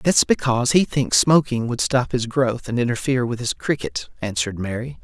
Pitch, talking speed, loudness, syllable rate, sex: 125 Hz, 190 wpm, -20 LUFS, 5.4 syllables/s, male